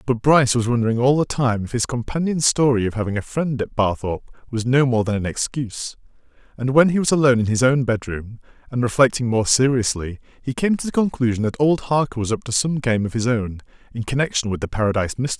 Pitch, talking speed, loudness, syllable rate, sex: 120 Hz, 225 wpm, -20 LUFS, 6.4 syllables/s, male